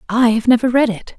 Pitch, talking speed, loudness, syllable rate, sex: 235 Hz, 255 wpm, -15 LUFS, 6.1 syllables/s, female